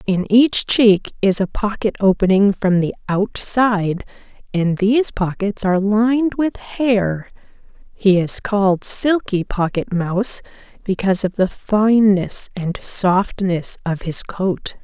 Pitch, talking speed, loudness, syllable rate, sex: 200 Hz, 130 wpm, -17 LUFS, 3.9 syllables/s, female